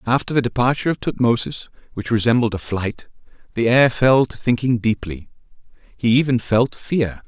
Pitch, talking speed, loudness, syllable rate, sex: 120 Hz, 155 wpm, -19 LUFS, 5.2 syllables/s, male